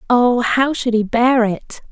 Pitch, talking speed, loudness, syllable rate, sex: 240 Hz, 190 wpm, -16 LUFS, 3.7 syllables/s, female